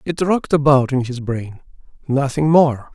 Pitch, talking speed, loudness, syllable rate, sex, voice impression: 140 Hz, 145 wpm, -17 LUFS, 4.7 syllables/s, male, very masculine, very adult-like, middle-aged, slightly thick, slightly relaxed, slightly weak, slightly dark, slightly soft, clear, fluent, slightly cool, intellectual, refreshing, very sincere, calm, slightly mature, slightly friendly, slightly reassuring, unique, slightly elegant, slightly sweet, kind, very modest, slightly light